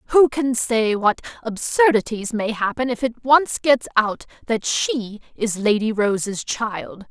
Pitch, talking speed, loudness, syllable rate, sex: 235 Hz, 150 wpm, -20 LUFS, 3.9 syllables/s, female